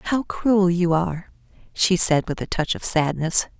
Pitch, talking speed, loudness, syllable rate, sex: 175 Hz, 185 wpm, -21 LUFS, 4.3 syllables/s, female